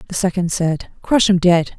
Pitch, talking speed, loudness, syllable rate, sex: 180 Hz, 200 wpm, -17 LUFS, 4.8 syllables/s, female